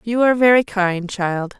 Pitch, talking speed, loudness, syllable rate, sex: 210 Hz, 190 wpm, -17 LUFS, 4.7 syllables/s, female